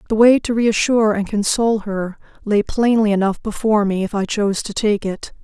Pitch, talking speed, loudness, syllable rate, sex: 210 Hz, 200 wpm, -18 LUFS, 5.5 syllables/s, female